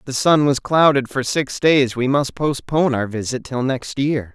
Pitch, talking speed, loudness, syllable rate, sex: 135 Hz, 220 wpm, -18 LUFS, 4.6 syllables/s, male